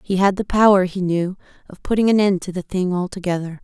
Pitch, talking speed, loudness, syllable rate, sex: 190 Hz, 230 wpm, -19 LUFS, 5.9 syllables/s, female